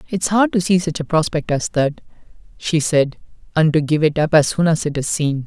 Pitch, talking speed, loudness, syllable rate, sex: 160 Hz, 255 wpm, -18 LUFS, 5.2 syllables/s, male